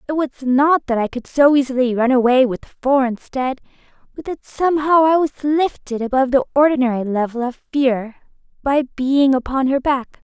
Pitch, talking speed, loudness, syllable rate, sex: 265 Hz, 175 wpm, -17 LUFS, 5.1 syllables/s, female